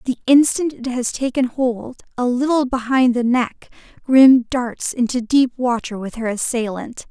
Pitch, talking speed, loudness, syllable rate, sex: 245 Hz, 145 wpm, -18 LUFS, 4.3 syllables/s, female